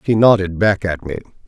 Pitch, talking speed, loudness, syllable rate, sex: 95 Hz, 205 wpm, -16 LUFS, 5.7 syllables/s, male